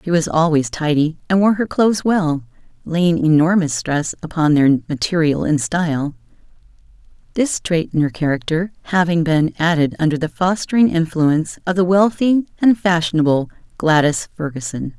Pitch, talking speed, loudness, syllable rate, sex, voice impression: 165 Hz, 145 wpm, -17 LUFS, 5.0 syllables/s, female, feminine, adult-like, slightly soft, calm, friendly, slightly elegant, slightly sweet, slightly kind